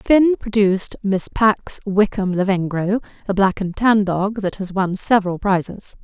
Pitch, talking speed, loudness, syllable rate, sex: 200 Hz, 160 wpm, -19 LUFS, 4.5 syllables/s, female